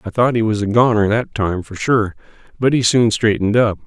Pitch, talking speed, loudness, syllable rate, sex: 110 Hz, 235 wpm, -16 LUFS, 5.5 syllables/s, male